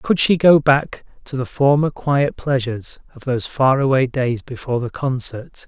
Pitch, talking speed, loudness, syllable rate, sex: 135 Hz, 170 wpm, -18 LUFS, 4.7 syllables/s, male